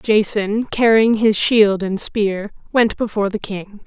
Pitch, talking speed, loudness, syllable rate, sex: 210 Hz, 155 wpm, -17 LUFS, 3.9 syllables/s, female